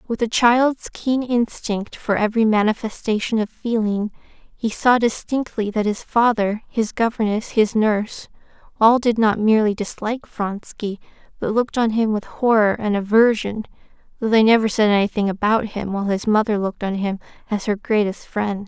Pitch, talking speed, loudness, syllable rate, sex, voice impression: 215 Hz, 160 wpm, -20 LUFS, 4.9 syllables/s, female, feminine, young, thin, weak, slightly bright, soft, slightly cute, calm, slightly reassuring, slightly elegant, slightly sweet, kind, modest